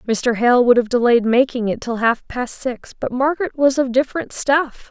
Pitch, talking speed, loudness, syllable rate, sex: 250 Hz, 210 wpm, -18 LUFS, 4.8 syllables/s, female